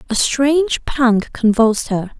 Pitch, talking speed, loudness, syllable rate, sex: 245 Hz, 135 wpm, -16 LUFS, 4.2 syllables/s, female